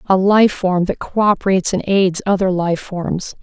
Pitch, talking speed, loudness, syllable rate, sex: 190 Hz, 175 wpm, -16 LUFS, 4.4 syllables/s, female